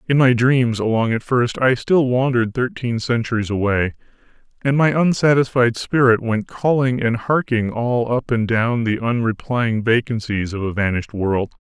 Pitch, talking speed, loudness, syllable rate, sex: 120 Hz, 160 wpm, -18 LUFS, 4.7 syllables/s, male